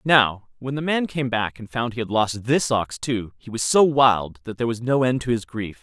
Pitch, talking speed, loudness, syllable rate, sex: 120 Hz, 270 wpm, -22 LUFS, 4.9 syllables/s, male